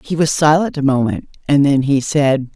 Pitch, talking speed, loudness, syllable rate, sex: 140 Hz, 210 wpm, -15 LUFS, 5.0 syllables/s, female